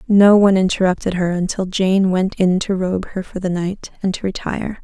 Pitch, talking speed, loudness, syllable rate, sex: 190 Hz, 210 wpm, -17 LUFS, 5.4 syllables/s, female